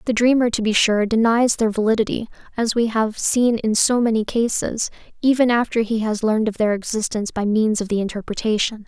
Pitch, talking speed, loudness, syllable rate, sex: 220 Hz, 195 wpm, -19 LUFS, 5.6 syllables/s, female